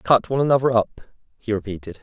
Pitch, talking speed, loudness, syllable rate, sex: 115 Hz, 180 wpm, -21 LUFS, 6.3 syllables/s, male